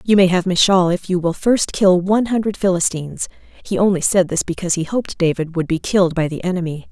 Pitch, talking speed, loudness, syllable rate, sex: 180 Hz, 225 wpm, -17 LUFS, 6.0 syllables/s, female